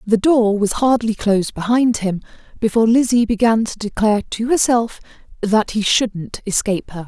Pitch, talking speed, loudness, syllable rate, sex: 220 Hz, 160 wpm, -17 LUFS, 5.1 syllables/s, female